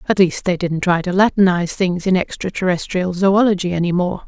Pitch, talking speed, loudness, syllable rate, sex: 185 Hz, 180 wpm, -17 LUFS, 5.6 syllables/s, female